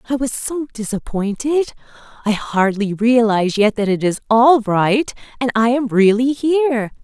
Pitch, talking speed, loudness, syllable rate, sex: 235 Hz, 155 wpm, -17 LUFS, 4.5 syllables/s, female